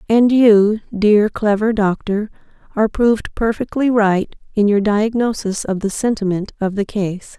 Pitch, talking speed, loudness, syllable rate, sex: 210 Hz, 145 wpm, -17 LUFS, 4.4 syllables/s, female